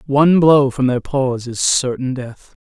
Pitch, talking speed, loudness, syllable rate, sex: 135 Hz, 180 wpm, -16 LUFS, 4.1 syllables/s, male